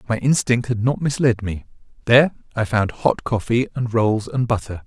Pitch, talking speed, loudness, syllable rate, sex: 115 Hz, 185 wpm, -20 LUFS, 5.1 syllables/s, male